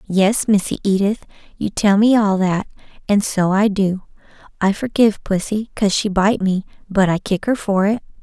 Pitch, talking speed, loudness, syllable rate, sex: 200 Hz, 180 wpm, -18 LUFS, 4.9 syllables/s, female